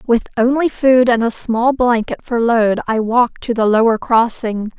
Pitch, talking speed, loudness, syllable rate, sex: 235 Hz, 190 wpm, -15 LUFS, 4.6 syllables/s, female